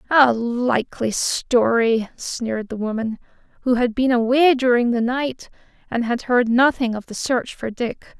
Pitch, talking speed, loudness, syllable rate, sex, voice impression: 240 Hz, 160 wpm, -20 LUFS, 4.3 syllables/s, female, feminine, slightly young, relaxed, bright, raspy, slightly cute, slightly calm, friendly, unique, slightly sharp, modest